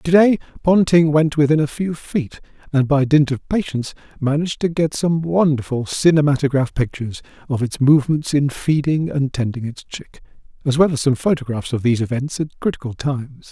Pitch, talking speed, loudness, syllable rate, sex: 145 Hz, 180 wpm, -18 LUFS, 5.4 syllables/s, male